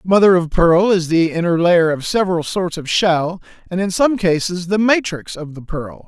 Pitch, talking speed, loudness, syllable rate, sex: 175 Hz, 210 wpm, -16 LUFS, 4.8 syllables/s, male